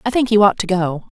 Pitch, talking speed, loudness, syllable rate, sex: 200 Hz, 315 wpm, -16 LUFS, 6.2 syllables/s, female